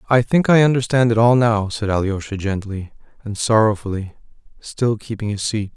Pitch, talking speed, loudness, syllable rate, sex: 110 Hz, 165 wpm, -18 LUFS, 5.2 syllables/s, male